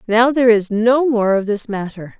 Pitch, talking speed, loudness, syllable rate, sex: 225 Hz, 220 wpm, -16 LUFS, 5.0 syllables/s, female